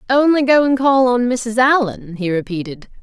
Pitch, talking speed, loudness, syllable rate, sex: 240 Hz, 180 wpm, -16 LUFS, 4.8 syllables/s, female